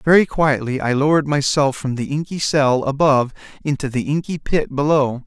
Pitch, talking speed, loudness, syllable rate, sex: 140 Hz, 170 wpm, -18 LUFS, 5.3 syllables/s, male